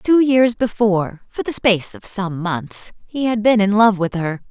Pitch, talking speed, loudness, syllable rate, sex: 210 Hz, 215 wpm, -18 LUFS, 4.5 syllables/s, female